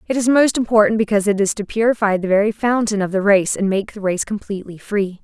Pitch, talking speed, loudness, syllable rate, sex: 205 Hz, 240 wpm, -18 LUFS, 6.3 syllables/s, female